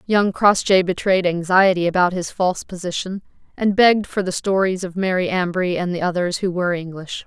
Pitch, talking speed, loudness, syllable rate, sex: 185 Hz, 180 wpm, -19 LUFS, 5.4 syllables/s, female